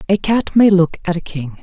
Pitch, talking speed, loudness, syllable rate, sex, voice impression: 180 Hz, 260 wpm, -15 LUFS, 5.2 syllables/s, female, feminine, adult-like, tensed, slightly hard, clear, fluent, intellectual, calm, reassuring, elegant, lively, slightly strict, slightly sharp